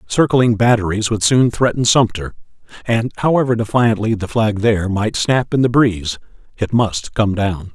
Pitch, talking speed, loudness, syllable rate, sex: 110 Hz, 165 wpm, -16 LUFS, 4.8 syllables/s, male